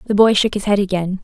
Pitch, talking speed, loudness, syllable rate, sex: 200 Hz, 290 wpm, -16 LUFS, 6.7 syllables/s, female